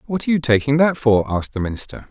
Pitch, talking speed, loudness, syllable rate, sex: 130 Hz, 255 wpm, -18 LUFS, 7.3 syllables/s, male